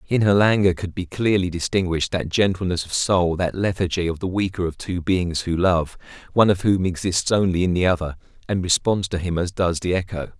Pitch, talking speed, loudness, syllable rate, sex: 90 Hz, 215 wpm, -21 LUFS, 5.6 syllables/s, male